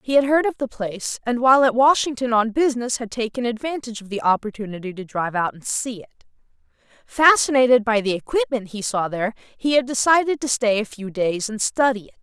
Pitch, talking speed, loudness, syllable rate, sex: 235 Hz, 205 wpm, -20 LUFS, 6.0 syllables/s, female